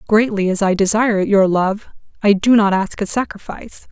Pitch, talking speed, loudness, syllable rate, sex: 205 Hz, 185 wpm, -16 LUFS, 5.2 syllables/s, female